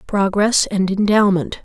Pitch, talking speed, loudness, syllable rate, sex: 200 Hz, 110 wpm, -16 LUFS, 4.1 syllables/s, female